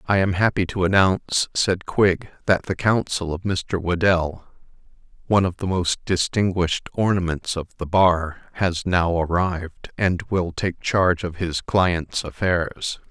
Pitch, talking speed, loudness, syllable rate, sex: 90 Hz, 140 wpm, -22 LUFS, 4.2 syllables/s, male